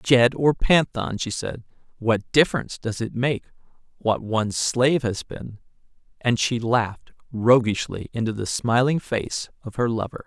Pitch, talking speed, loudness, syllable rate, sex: 120 Hz, 150 wpm, -23 LUFS, 4.5 syllables/s, male